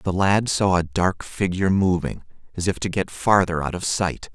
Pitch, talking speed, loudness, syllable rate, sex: 95 Hz, 205 wpm, -22 LUFS, 4.8 syllables/s, male